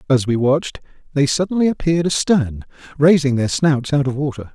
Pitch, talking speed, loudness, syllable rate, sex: 145 Hz, 170 wpm, -17 LUFS, 5.8 syllables/s, male